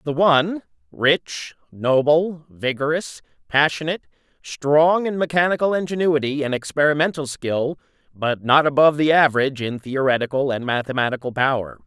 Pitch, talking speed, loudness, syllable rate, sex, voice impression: 145 Hz, 115 wpm, -20 LUFS, 5.2 syllables/s, male, masculine, middle-aged, tensed, slightly powerful, bright, clear, fluent, friendly, reassuring, wild, lively, slightly strict, slightly sharp